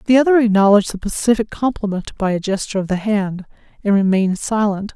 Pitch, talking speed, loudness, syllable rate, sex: 210 Hz, 180 wpm, -17 LUFS, 6.4 syllables/s, female